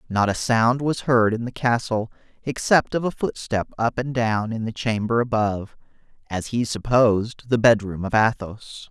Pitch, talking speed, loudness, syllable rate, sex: 115 Hz, 170 wpm, -22 LUFS, 4.6 syllables/s, male